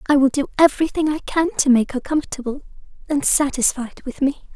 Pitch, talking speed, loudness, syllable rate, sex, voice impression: 275 Hz, 185 wpm, -19 LUFS, 6.0 syllables/s, female, feminine, adult-like, tensed, slightly bright, slightly soft, clear, fluent, slightly friendly, reassuring, elegant, lively, kind